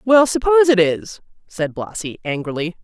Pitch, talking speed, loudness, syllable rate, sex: 195 Hz, 150 wpm, -18 LUFS, 5.0 syllables/s, female